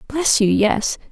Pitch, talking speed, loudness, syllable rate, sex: 240 Hz, 160 wpm, -17 LUFS, 3.5 syllables/s, female